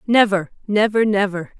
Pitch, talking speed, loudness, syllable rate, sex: 200 Hz, 115 wpm, -18 LUFS, 4.9 syllables/s, female